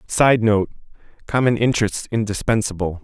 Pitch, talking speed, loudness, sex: 110 Hz, 80 wpm, -19 LUFS, male